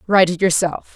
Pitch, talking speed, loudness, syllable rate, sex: 180 Hz, 190 wpm, -17 LUFS, 6.2 syllables/s, female